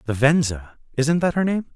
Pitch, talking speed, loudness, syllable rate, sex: 145 Hz, 205 wpm, -21 LUFS, 4.7 syllables/s, male